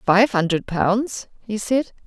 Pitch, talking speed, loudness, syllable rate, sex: 210 Hz, 145 wpm, -21 LUFS, 3.5 syllables/s, female